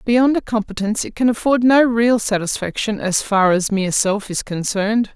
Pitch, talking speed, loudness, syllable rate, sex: 215 Hz, 185 wpm, -18 LUFS, 5.2 syllables/s, female